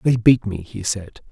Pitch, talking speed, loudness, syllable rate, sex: 110 Hz, 230 wpm, -20 LUFS, 4.5 syllables/s, male